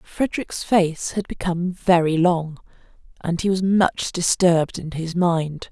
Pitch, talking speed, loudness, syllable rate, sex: 175 Hz, 145 wpm, -21 LUFS, 4.2 syllables/s, female